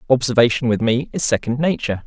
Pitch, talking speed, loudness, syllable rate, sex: 125 Hz, 175 wpm, -18 LUFS, 6.5 syllables/s, male